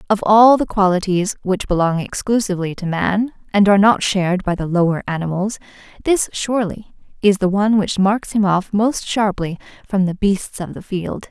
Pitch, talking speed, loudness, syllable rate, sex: 195 Hz, 180 wpm, -17 LUFS, 5.1 syllables/s, female